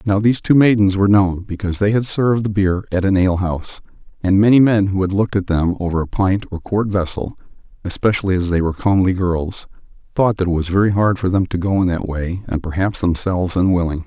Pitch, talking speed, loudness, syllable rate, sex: 95 Hz, 225 wpm, -17 LUFS, 5.5 syllables/s, male